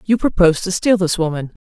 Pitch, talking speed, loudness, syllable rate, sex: 180 Hz, 220 wpm, -16 LUFS, 6.1 syllables/s, female